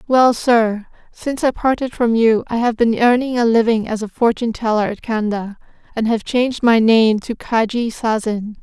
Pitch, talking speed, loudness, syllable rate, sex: 230 Hz, 190 wpm, -17 LUFS, 4.9 syllables/s, female